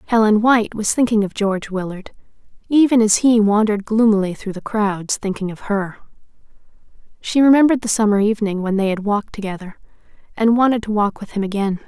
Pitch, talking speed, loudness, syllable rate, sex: 210 Hz, 175 wpm, -17 LUFS, 6.1 syllables/s, female